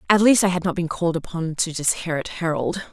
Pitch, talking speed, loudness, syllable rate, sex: 170 Hz, 225 wpm, -21 LUFS, 6.3 syllables/s, female